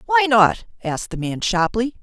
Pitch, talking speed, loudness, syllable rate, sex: 220 Hz, 180 wpm, -19 LUFS, 4.9 syllables/s, female